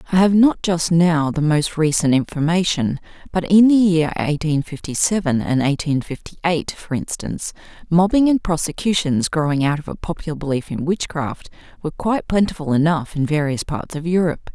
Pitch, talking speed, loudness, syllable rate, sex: 165 Hz, 175 wpm, -19 LUFS, 5.3 syllables/s, female